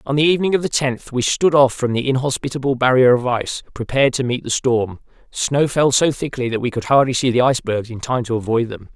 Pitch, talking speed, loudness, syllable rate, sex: 130 Hz, 240 wpm, -18 LUFS, 6.1 syllables/s, male